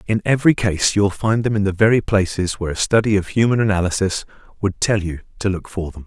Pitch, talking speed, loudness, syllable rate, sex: 100 Hz, 235 wpm, -19 LUFS, 6.3 syllables/s, male